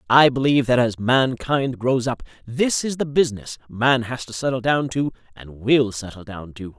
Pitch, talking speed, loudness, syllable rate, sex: 125 Hz, 195 wpm, -20 LUFS, 4.8 syllables/s, male